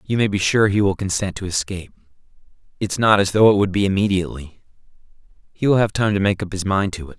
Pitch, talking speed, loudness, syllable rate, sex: 100 Hz, 235 wpm, -19 LUFS, 6.6 syllables/s, male